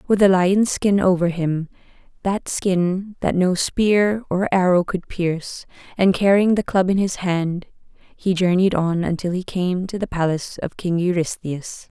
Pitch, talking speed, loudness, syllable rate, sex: 185 Hz, 160 wpm, -20 LUFS, 4.2 syllables/s, female